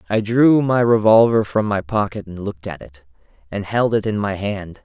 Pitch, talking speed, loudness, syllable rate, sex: 105 Hz, 210 wpm, -18 LUFS, 5.0 syllables/s, male